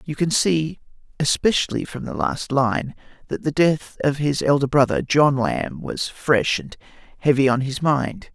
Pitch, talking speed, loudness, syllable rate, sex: 140 Hz, 170 wpm, -21 LUFS, 4.3 syllables/s, male